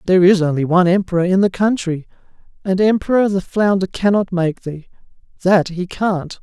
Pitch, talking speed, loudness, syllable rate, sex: 185 Hz, 170 wpm, -16 LUFS, 5.5 syllables/s, male